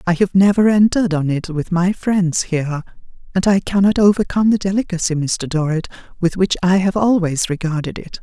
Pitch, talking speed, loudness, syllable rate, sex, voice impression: 180 Hz, 180 wpm, -17 LUFS, 5.5 syllables/s, female, gender-neutral, adult-like, thin, relaxed, weak, slightly dark, soft, muffled, calm, slightly friendly, reassuring, unique, kind, modest